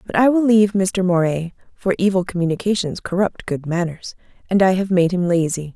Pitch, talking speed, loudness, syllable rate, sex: 185 Hz, 190 wpm, -19 LUFS, 5.6 syllables/s, female